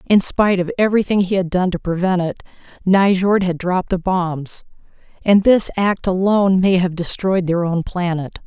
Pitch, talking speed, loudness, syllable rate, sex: 185 Hz, 175 wpm, -17 LUFS, 5.1 syllables/s, female